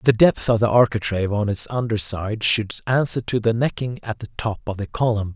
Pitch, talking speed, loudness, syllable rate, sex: 110 Hz, 225 wpm, -21 LUFS, 5.3 syllables/s, male